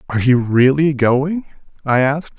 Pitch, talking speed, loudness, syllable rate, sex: 135 Hz, 150 wpm, -16 LUFS, 5.0 syllables/s, male